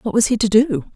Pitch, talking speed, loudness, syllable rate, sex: 220 Hz, 315 wpm, -17 LUFS, 6.0 syllables/s, female